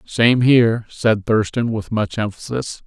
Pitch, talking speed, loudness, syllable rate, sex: 115 Hz, 145 wpm, -18 LUFS, 4.1 syllables/s, male